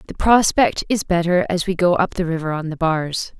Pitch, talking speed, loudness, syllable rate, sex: 175 Hz, 230 wpm, -18 LUFS, 5.1 syllables/s, female